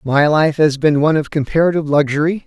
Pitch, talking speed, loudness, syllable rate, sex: 150 Hz, 195 wpm, -15 LUFS, 6.4 syllables/s, male